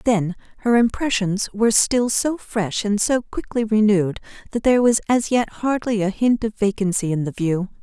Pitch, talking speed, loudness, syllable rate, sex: 215 Hz, 185 wpm, -20 LUFS, 5.0 syllables/s, female